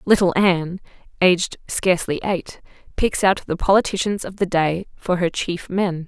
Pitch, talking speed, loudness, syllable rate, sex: 180 Hz, 160 wpm, -20 LUFS, 4.8 syllables/s, female